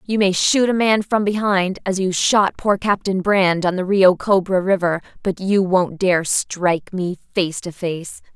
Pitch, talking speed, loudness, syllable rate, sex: 190 Hz, 195 wpm, -18 LUFS, 4.0 syllables/s, female